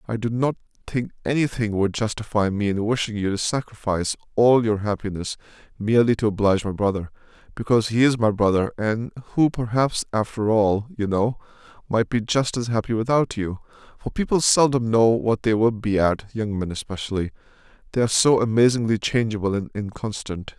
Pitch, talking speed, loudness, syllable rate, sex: 110 Hz, 170 wpm, -22 LUFS, 5.6 syllables/s, male